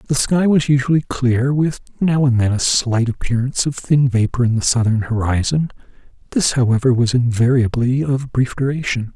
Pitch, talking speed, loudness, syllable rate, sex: 125 Hz, 165 wpm, -17 LUFS, 5.0 syllables/s, male